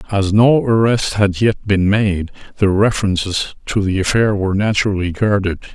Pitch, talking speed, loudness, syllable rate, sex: 100 Hz, 155 wpm, -16 LUFS, 5.1 syllables/s, male